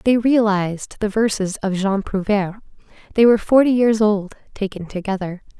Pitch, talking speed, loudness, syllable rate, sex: 205 Hz, 150 wpm, -19 LUFS, 5.3 syllables/s, female